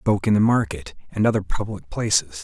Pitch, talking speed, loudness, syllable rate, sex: 100 Hz, 220 wpm, -22 LUFS, 6.2 syllables/s, male